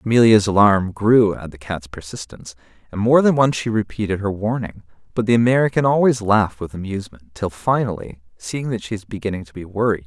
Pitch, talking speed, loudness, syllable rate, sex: 105 Hz, 205 wpm, -19 LUFS, 6.1 syllables/s, male